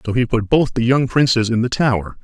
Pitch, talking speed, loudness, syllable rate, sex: 120 Hz, 270 wpm, -17 LUFS, 5.8 syllables/s, male